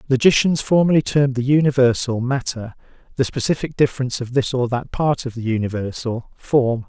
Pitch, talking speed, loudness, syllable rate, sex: 130 Hz, 155 wpm, -19 LUFS, 5.6 syllables/s, male